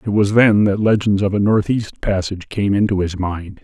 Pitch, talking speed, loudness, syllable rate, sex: 100 Hz, 215 wpm, -17 LUFS, 5.1 syllables/s, male